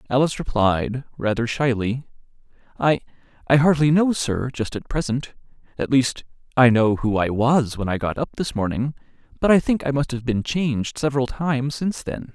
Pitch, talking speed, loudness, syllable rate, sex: 130 Hz, 170 wpm, -21 LUFS, 5.3 syllables/s, male